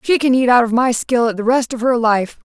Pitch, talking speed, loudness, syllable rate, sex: 240 Hz, 285 wpm, -15 LUFS, 5.6 syllables/s, female